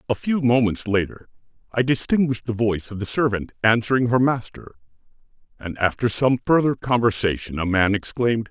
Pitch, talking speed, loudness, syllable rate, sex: 115 Hz, 155 wpm, -21 LUFS, 5.6 syllables/s, male